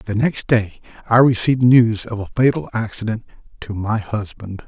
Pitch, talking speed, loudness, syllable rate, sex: 110 Hz, 165 wpm, -18 LUFS, 5.0 syllables/s, male